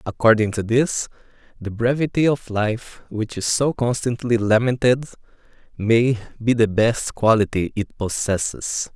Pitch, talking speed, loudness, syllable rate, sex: 115 Hz, 125 wpm, -20 LUFS, 4.3 syllables/s, male